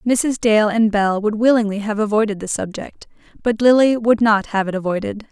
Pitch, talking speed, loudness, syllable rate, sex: 215 Hz, 190 wpm, -17 LUFS, 5.0 syllables/s, female